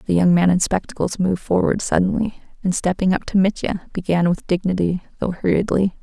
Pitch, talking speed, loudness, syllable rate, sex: 185 Hz, 180 wpm, -20 LUFS, 5.7 syllables/s, female